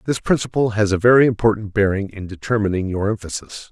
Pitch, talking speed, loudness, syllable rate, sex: 105 Hz, 180 wpm, -19 LUFS, 6.2 syllables/s, male